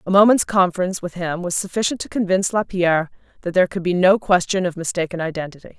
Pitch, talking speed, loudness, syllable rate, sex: 180 Hz, 195 wpm, -19 LUFS, 6.7 syllables/s, female